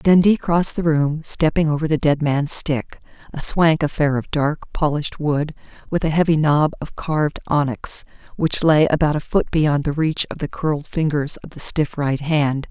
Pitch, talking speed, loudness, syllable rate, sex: 150 Hz, 190 wpm, -19 LUFS, 4.7 syllables/s, female